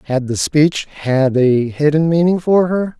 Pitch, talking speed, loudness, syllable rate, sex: 150 Hz, 180 wpm, -15 LUFS, 3.9 syllables/s, male